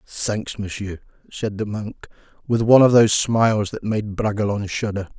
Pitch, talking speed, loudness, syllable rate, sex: 105 Hz, 160 wpm, -20 LUFS, 5.2 syllables/s, male